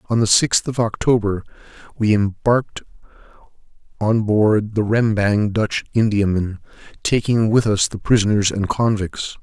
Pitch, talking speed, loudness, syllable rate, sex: 105 Hz, 125 wpm, -18 LUFS, 4.4 syllables/s, male